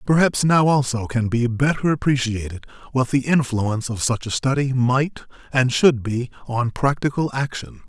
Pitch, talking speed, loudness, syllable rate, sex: 130 Hz, 160 wpm, -20 LUFS, 4.8 syllables/s, male